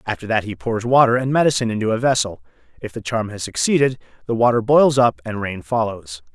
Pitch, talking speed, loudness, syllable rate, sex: 115 Hz, 210 wpm, -19 LUFS, 6.1 syllables/s, male